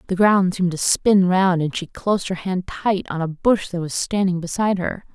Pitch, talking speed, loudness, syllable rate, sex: 185 Hz, 235 wpm, -20 LUFS, 5.1 syllables/s, female